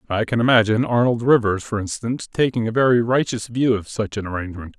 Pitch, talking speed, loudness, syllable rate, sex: 115 Hz, 200 wpm, -20 LUFS, 6.4 syllables/s, male